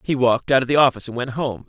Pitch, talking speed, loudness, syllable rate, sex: 130 Hz, 320 wpm, -19 LUFS, 7.6 syllables/s, male